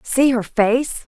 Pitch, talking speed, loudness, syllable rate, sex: 240 Hz, 150 wpm, -18 LUFS, 3.2 syllables/s, female